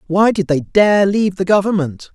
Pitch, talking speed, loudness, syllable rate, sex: 185 Hz, 195 wpm, -15 LUFS, 5.1 syllables/s, male